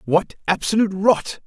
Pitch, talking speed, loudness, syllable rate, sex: 195 Hz, 125 wpm, -20 LUFS, 5.0 syllables/s, male